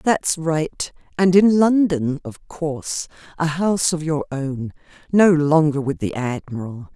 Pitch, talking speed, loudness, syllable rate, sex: 155 Hz, 145 wpm, -20 LUFS, 3.9 syllables/s, female